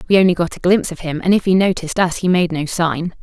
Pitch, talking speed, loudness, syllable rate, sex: 175 Hz, 295 wpm, -17 LUFS, 6.7 syllables/s, female